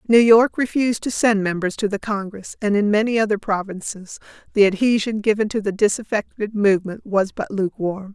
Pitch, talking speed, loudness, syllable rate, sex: 205 Hz, 175 wpm, -20 LUFS, 5.5 syllables/s, female